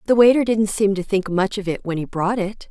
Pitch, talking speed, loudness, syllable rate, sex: 200 Hz, 290 wpm, -19 LUFS, 5.6 syllables/s, female